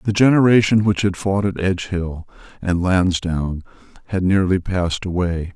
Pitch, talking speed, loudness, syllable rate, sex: 95 Hz, 140 wpm, -19 LUFS, 5.0 syllables/s, male